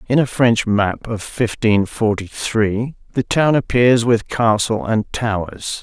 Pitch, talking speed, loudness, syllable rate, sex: 115 Hz, 155 wpm, -18 LUFS, 3.7 syllables/s, male